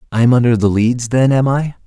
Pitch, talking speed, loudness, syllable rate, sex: 125 Hz, 255 wpm, -14 LUFS, 5.8 syllables/s, male